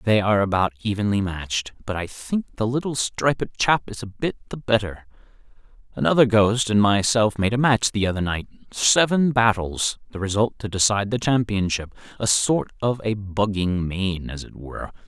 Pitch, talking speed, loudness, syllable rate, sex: 105 Hz, 165 wpm, -22 LUFS, 5.1 syllables/s, male